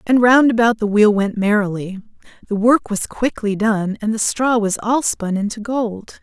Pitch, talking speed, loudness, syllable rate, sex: 215 Hz, 195 wpm, -17 LUFS, 4.5 syllables/s, female